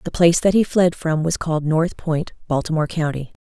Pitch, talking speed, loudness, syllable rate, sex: 165 Hz, 210 wpm, -19 LUFS, 5.8 syllables/s, female